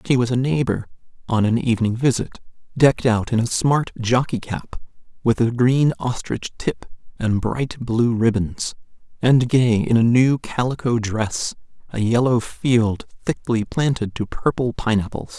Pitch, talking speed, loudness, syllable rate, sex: 120 Hz, 150 wpm, -20 LUFS, 4.4 syllables/s, male